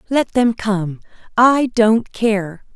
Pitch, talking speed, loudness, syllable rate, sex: 220 Hz, 130 wpm, -16 LUFS, 2.9 syllables/s, female